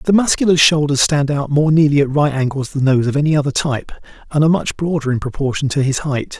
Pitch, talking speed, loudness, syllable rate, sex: 145 Hz, 235 wpm, -16 LUFS, 6.3 syllables/s, male